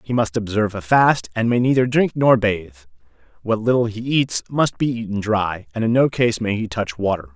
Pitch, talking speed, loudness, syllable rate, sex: 110 Hz, 220 wpm, -19 LUFS, 5.2 syllables/s, male